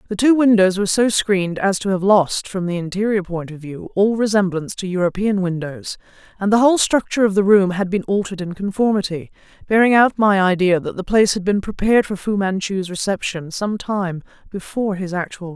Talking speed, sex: 205 wpm, female